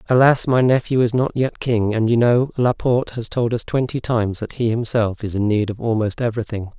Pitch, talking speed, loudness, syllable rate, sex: 115 Hz, 220 wpm, -19 LUFS, 5.6 syllables/s, male